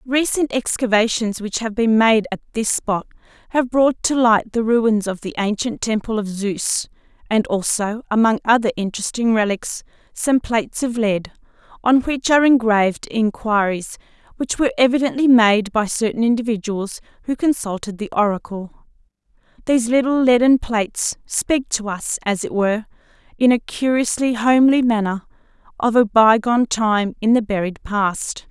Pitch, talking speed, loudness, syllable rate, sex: 225 Hz, 150 wpm, -18 LUFS, 4.8 syllables/s, female